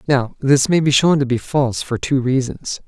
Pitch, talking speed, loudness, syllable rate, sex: 135 Hz, 230 wpm, -17 LUFS, 4.9 syllables/s, male